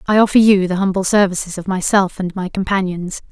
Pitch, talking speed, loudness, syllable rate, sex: 190 Hz, 200 wpm, -16 LUFS, 5.8 syllables/s, female